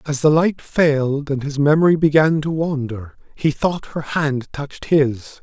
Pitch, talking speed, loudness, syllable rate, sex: 145 Hz, 175 wpm, -18 LUFS, 4.4 syllables/s, male